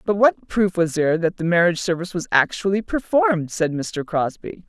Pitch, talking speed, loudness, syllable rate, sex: 175 Hz, 190 wpm, -20 LUFS, 5.5 syllables/s, female